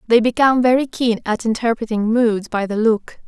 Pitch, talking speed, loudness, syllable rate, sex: 230 Hz, 185 wpm, -17 LUFS, 5.4 syllables/s, female